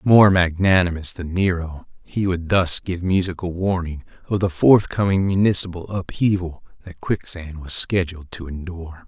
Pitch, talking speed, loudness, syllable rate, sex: 90 Hz, 140 wpm, -20 LUFS, 4.8 syllables/s, male